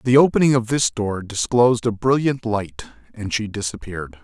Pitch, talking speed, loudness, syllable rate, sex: 110 Hz, 170 wpm, -20 LUFS, 5.3 syllables/s, male